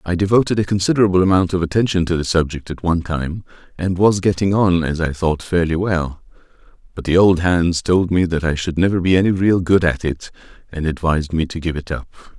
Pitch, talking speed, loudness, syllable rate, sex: 90 Hz, 220 wpm, -17 LUFS, 5.9 syllables/s, male